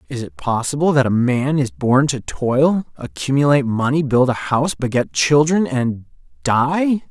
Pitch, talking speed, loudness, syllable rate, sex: 135 Hz, 150 wpm, -17 LUFS, 4.6 syllables/s, male